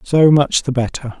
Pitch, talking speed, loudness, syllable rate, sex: 135 Hz, 200 wpm, -15 LUFS, 4.6 syllables/s, male